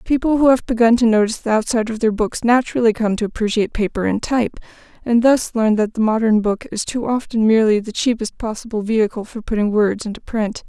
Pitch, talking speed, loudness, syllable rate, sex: 225 Hz, 215 wpm, -18 LUFS, 6.3 syllables/s, female